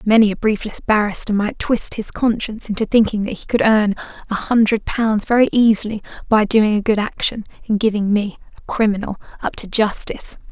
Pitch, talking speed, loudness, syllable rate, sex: 215 Hz, 175 wpm, -18 LUFS, 5.5 syllables/s, female